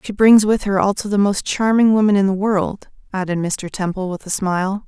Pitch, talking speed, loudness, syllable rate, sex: 200 Hz, 220 wpm, -17 LUFS, 5.3 syllables/s, female